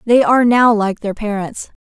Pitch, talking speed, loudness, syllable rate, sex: 220 Hz, 195 wpm, -14 LUFS, 5.0 syllables/s, female